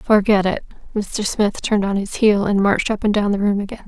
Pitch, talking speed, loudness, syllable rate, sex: 205 Hz, 250 wpm, -19 LUFS, 5.8 syllables/s, female